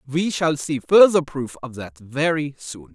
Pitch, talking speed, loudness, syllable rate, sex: 140 Hz, 185 wpm, -19 LUFS, 4.3 syllables/s, male